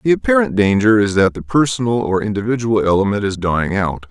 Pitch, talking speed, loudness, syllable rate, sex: 105 Hz, 190 wpm, -16 LUFS, 6.0 syllables/s, male